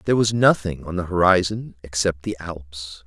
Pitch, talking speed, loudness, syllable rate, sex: 90 Hz, 175 wpm, -21 LUFS, 4.8 syllables/s, male